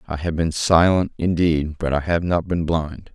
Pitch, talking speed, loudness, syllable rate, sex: 80 Hz, 210 wpm, -20 LUFS, 4.4 syllables/s, male